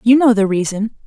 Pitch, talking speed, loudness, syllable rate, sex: 220 Hz, 225 wpm, -15 LUFS, 5.6 syllables/s, female